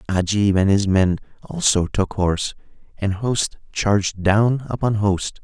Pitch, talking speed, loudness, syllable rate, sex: 100 Hz, 145 wpm, -20 LUFS, 4.1 syllables/s, male